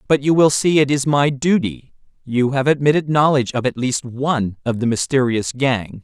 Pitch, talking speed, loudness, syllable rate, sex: 135 Hz, 200 wpm, -18 LUFS, 5.1 syllables/s, male